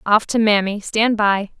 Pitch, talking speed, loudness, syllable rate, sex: 210 Hz, 190 wpm, -17 LUFS, 4.3 syllables/s, female